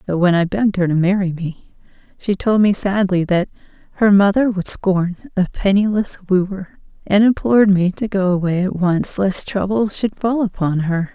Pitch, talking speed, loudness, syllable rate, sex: 190 Hz, 185 wpm, -17 LUFS, 4.8 syllables/s, female